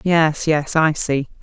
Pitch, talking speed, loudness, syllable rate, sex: 155 Hz, 170 wpm, -18 LUFS, 3.3 syllables/s, female